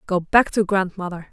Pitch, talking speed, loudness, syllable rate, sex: 190 Hz, 180 wpm, -19 LUFS, 5.1 syllables/s, female